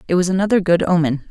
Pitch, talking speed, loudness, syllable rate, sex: 175 Hz, 230 wpm, -17 LUFS, 7.1 syllables/s, female